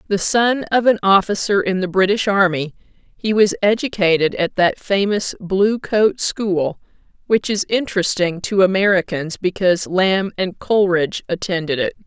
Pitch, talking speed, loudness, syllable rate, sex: 195 Hz, 145 wpm, -17 LUFS, 4.6 syllables/s, female